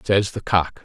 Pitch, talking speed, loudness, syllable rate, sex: 95 Hz, 215 wpm, -21 LUFS, 4.1 syllables/s, male